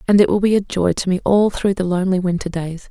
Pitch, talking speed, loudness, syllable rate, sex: 190 Hz, 290 wpm, -18 LUFS, 6.3 syllables/s, female